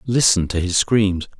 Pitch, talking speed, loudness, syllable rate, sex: 100 Hz, 170 wpm, -18 LUFS, 4.2 syllables/s, male